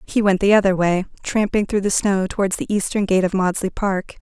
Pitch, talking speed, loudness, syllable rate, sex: 195 Hz, 225 wpm, -19 LUFS, 5.7 syllables/s, female